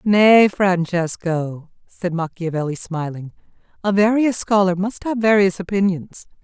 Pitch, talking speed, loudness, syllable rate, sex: 185 Hz, 110 wpm, -19 LUFS, 4.2 syllables/s, female